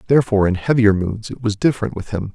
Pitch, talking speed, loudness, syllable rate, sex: 105 Hz, 230 wpm, -18 LUFS, 6.9 syllables/s, male